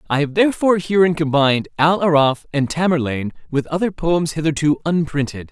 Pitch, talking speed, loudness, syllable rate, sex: 155 Hz, 150 wpm, -18 LUFS, 5.9 syllables/s, male